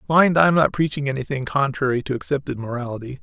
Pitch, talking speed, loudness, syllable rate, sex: 140 Hz, 185 wpm, -21 LUFS, 6.6 syllables/s, male